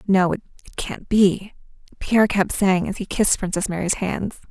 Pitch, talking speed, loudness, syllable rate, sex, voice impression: 195 Hz, 175 wpm, -21 LUFS, 4.9 syllables/s, female, feminine, adult-like, slightly cool, calm, slightly sweet